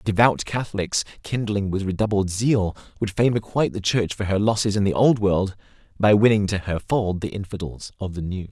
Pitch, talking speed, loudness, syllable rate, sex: 100 Hz, 195 wpm, -22 LUFS, 5.4 syllables/s, male